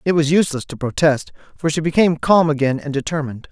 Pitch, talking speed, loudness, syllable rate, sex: 150 Hz, 205 wpm, -18 LUFS, 6.6 syllables/s, male